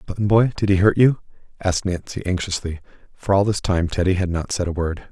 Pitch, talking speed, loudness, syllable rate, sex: 95 Hz, 225 wpm, -20 LUFS, 5.8 syllables/s, male